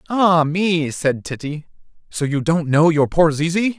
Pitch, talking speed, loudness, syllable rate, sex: 165 Hz, 175 wpm, -18 LUFS, 4.1 syllables/s, male